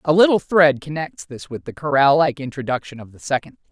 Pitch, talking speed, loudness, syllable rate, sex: 145 Hz, 225 wpm, -19 LUFS, 6.6 syllables/s, female